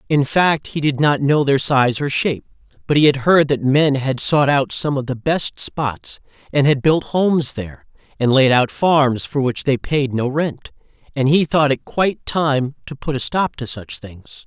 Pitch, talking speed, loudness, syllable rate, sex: 140 Hz, 215 wpm, -17 LUFS, 4.4 syllables/s, male